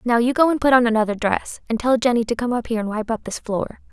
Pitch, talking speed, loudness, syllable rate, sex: 235 Hz, 305 wpm, -20 LUFS, 6.6 syllables/s, female